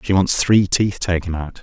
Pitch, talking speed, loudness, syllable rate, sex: 90 Hz, 220 wpm, -17 LUFS, 4.6 syllables/s, male